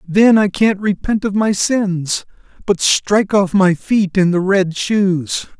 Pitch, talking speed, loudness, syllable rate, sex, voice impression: 195 Hz, 170 wpm, -15 LUFS, 3.6 syllables/s, male, masculine, middle-aged, thick, tensed, powerful, slightly hard, cool, calm, mature, slightly reassuring, wild, lively, slightly strict, slightly sharp